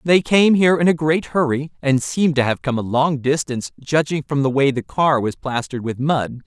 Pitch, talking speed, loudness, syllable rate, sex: 145 Hz, 230 wpm, -18 LUFS, 5.4 syllables/s, male